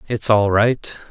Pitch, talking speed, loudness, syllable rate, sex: 110 Hz, 165 wpm, -17 LUFS, 3.5 syllables/s, male